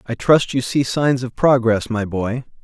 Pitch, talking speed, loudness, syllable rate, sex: 125 Hz, 205 wpm, -18 LUFS, 4.3 syllables/s, male